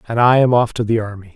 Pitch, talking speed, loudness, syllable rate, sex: 115 Hz, 310 wpm, -15 LUFS, 7.0 syllables/s, male